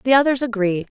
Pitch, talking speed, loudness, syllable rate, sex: 235 Hz, 180 wpm, -19 LUFS, 6.3 syllables/s, female